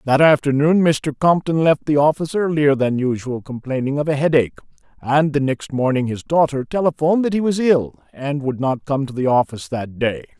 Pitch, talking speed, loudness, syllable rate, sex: 145 Hz, 195 wpm, -18 LUFS, 5.5 syllables/s, male